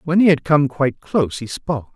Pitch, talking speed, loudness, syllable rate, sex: 145 Hz, 245 wpm, -18 LUFS, 6.0 syllables/s, male